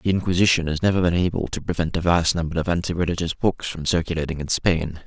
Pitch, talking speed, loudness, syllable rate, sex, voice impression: 85 Hz, 225 wpm, -22 LUFS, 6.4 syllables/s, male, very masculine, adult-like, slightly muffled, cool, calm, slightly mature, sweet